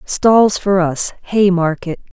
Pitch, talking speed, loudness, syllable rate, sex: 185 Hz, 110 wpm, -14 LUFS, 3.2 syllables/s, female